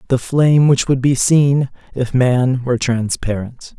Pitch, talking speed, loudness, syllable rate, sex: 130 Hz, 160 wpm, -15 LUFS, 4.2 syllables/s, male